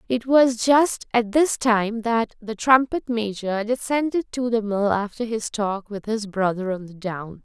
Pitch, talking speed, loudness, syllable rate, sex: 225 Hz, 185 wpm, -22 LUFS, 4.1 syllables/s, female